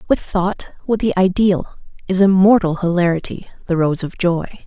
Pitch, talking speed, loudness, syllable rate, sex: 185 Hz, 155 wpm, -17 LUFS, 4.8 syllables/s, female